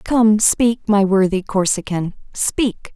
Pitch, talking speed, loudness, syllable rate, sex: 210 Hz, 120 wpm, -17 LUFS, 3.3 syllables/s, female